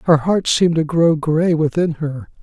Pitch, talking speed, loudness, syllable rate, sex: 160 Hz, 200 wpm, -17 LUFS, 4.4 syllables/s, male